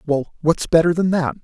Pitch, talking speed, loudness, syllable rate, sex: 160 Hz, 210 wpm, -18 LUFS, 5.1 syllables/s, male